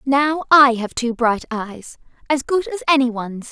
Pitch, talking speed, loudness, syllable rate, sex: 260 Hz, 190 wpm, -18 LUFS, 4.4 syllables/s, female